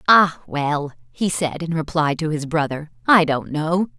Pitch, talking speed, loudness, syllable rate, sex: 155 Hz, 180 wpm, -20 LUFS, 4.2 syllables/s, female